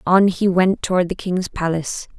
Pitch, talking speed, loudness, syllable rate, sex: 180 Hz, 190 wpm, -19 LUFS, 5.0 syllables/s, female